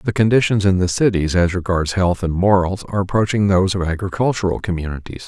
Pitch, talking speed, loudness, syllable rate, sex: 95 Hz, 180 wpm, -18 LUFS, 6.2 syllables/s, male